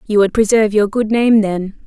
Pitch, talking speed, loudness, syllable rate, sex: 210 Hz, 225 wpm, -14 LUFS, 5.4 syllables/s, female